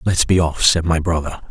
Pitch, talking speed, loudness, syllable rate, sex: 85 Hz, 280 wpm, -17 LUFS, 6.0 syllables/s, male